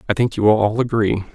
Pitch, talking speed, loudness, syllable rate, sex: 110 Hz, 270 wpm, -18 LUFS, 6.1 syllables/s, male